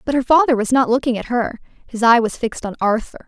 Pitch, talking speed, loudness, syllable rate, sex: 240 Hz, 255 wpm, -17 LUFS, 6.4 syllables/s, female